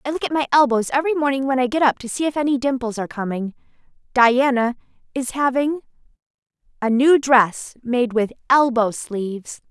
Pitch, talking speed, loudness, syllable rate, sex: 255 Hz, 175 wpm, -19 LUFS, 5.5 syllables/s, female